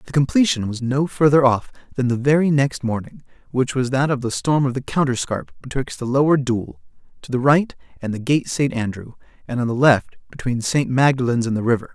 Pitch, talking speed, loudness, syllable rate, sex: 130 Hz, 205 wpm, -20 LUFS, 5.6 syllables/s, male